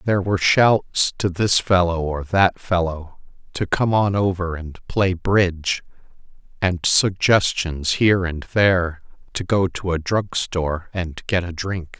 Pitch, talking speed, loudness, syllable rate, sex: 90 Hz, 155 wpm, -20 LUFS, 4.1 syllables/s, male